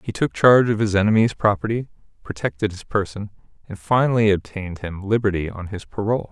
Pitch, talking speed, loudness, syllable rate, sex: 105 Hz, 170 wpm, -20 LUFS, 6.2 syllables/s, male